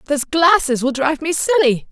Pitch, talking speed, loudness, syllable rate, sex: 295 Hz, 190 wpm, -16 LUFS, 5.8 syllables/s, female